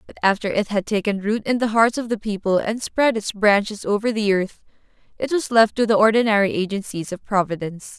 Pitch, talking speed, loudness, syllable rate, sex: 210 Hz, 210 wpm, -20 LUFS, 5.7 syllables/s, female